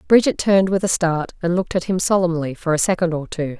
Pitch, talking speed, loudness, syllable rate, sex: 175 Hz, 250 wpm, -19 LUFS, 6.3 syllables/s, female